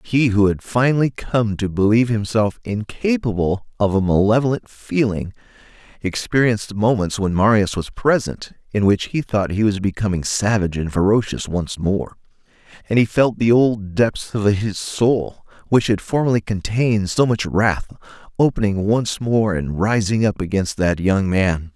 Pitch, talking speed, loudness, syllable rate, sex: 105 Hz, 155 wpm, -19 LUFS, 4.6 syllables/s, male